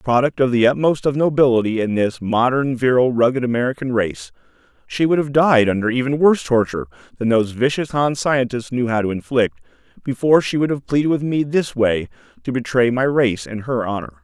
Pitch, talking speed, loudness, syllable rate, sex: 125 Hz, 195 wpm, -18 LUFS, 5.8 syllables/s, male